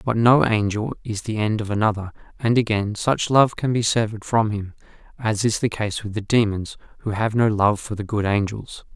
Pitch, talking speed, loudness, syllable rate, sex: 110 Hz, 215 wpm, -21 LUFS, 5.2 syllables/s, male